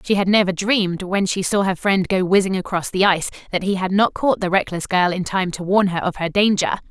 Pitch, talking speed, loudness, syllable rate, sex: 190 Hz, 260 wpm, -19 LUFS, 5.7 syllables/s, female